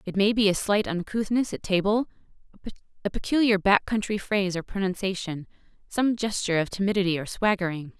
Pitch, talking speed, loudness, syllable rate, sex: 195 Hz, 160 wpm, -25 LUFS, 5.9 syllables/s, female